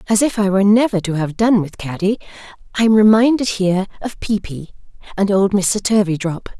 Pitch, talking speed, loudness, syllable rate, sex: 200 Hz, 180 wpm, -16 LUFS, 5.6 syllables/s, female